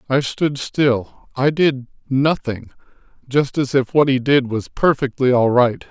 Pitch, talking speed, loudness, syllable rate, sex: 130 Hz, 165 wpm, -18 LUFS, 4.0 syllables/s, male